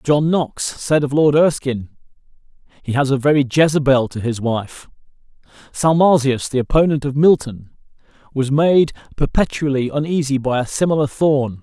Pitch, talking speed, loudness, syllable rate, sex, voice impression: 140 Hz, 140 wpm, -17 LUFS, 4.9 syllables/s, male, masculine, very adult-like, very middle-aged, thick, tensed, slightly powerful, bright, hard, clear, fluent, cool, intellectual, very sincere, very calm, mature, slightly friendly, reassuring, slightly unique, slightly wild, slightly sweet, kind, slightly intense